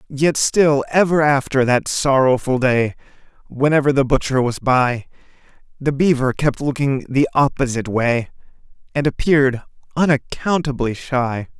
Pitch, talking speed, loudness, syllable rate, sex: 135 Hz, 120 wpm, -18 LUFS, 4.6 syllables/s, male